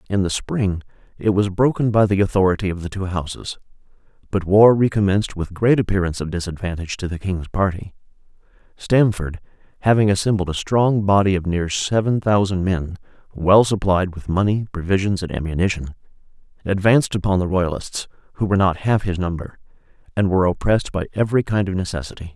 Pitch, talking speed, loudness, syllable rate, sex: 95 Hz, 165 wpm, -20 LUFS, 5.9 syllables/s, male